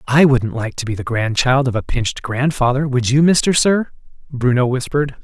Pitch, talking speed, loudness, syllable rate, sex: 130 Hz, 195 wpm, -17 LUFS, 5.4 syllables/s, male